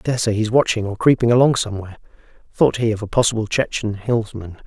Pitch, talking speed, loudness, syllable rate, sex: 110 Hz, 195 wpm, -18 LUFS, 6.6 syllables/s, male